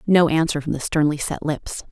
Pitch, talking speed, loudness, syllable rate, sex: 155 Hz, 220 wpm, -21 LUFS, 5.2 syllables/s, female